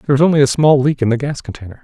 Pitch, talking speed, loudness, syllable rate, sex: 135 Hz, 325 wpm, -14 LUFS, 7.8 syllables/s, male